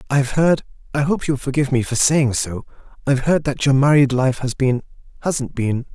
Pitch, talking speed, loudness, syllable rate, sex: 135 Hz, 170 wpm, -19 LUFS, 5.5 syllables/s, male